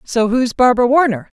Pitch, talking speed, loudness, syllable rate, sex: 240 Hz, 170 wpm, -14 LUFS, 5.7 syllables/s, female